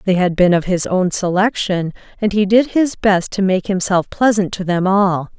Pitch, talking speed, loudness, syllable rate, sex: 190 Hz, 210 wpm, -16 LUFS, 4.7 syllables/s, female